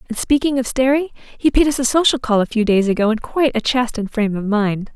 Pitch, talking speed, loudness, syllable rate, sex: 240 Hz, 255 wpm, -17 LUFS, 6.1 syllables/s, female